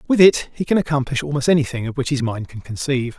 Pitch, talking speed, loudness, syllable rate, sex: 140 Hz, 245 wpm, -19 LUFS, 6.7 syllables/s, male